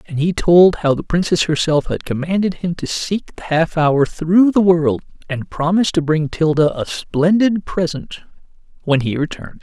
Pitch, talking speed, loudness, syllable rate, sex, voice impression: 165 Hz, 180 wpm, -17 LUFS, 4.7 syllables/s, male, very masculine, slightly middle-aged, thick, tensed, powerful, bright, slightly soft, muffled, fluent, raspy, cool, intellectual, refreshing, slightly sincere, calm, mature, slightly friendly, reassuring, unique, slightly elegant, wild, slightly sweet, lively, slightly kind, slightly intense